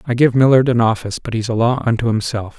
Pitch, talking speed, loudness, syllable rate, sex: 120 Hz, 255 wpm, -16 LUFS, 6.5 syllables/s, male